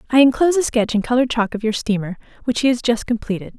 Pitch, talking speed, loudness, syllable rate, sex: 235 Hz, 250 wpm, -19 LUFS, 7.1 syllables/s, female